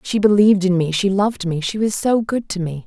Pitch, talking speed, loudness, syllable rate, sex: 195 Hz, 230 wpm, -18 LUFS, 5.8 syllables/s, female